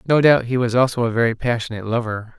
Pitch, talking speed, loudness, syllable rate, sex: 120 Hz, 225 wpm, -19 LUFS, 6.8 syllables/s, male